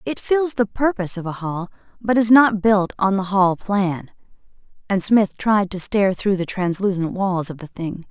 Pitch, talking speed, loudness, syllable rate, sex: 195 Hz, 200 wpm, -19 LUFS, 4.7 syllables/s, female